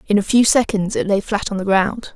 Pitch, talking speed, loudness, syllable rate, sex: 205 Hz, 280 wpm, -17 LUFS, 5.5 syllables/s, female